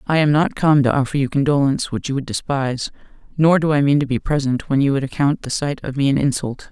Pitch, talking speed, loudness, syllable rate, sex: 140 Hz, 260 wpm, -18 LUFS, 6.2 syllables/s, female